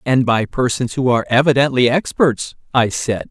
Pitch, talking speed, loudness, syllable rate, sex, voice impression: 125 Hz, 165 wpm, -16 LUFS, 5.0 syllables/s, male, very masculine, very adult-like, middle-aged, thick, tensed, powerful, bright, slightly hard, very clear, fluent, cool, very intellectual, very refreshing, sincere, calm, mature, very friendly, reassuring, very unique, slightly elegant, wild, slightly sweet, very lively, very kind, very modest